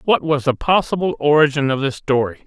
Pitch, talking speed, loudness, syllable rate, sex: 145 Hz, 195 wpm, -17 LUFS, 5.5 syllables/s, male